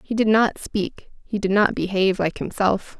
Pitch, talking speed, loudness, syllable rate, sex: 205 Hz, 200 wpm, -21 LUFS, 4.8 syllables/s, female